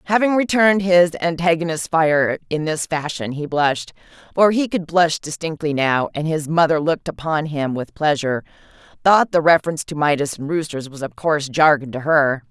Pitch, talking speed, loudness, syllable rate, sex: 160 Hz, 170 wpm, -19 LUFS, 5.3 syllables/s, female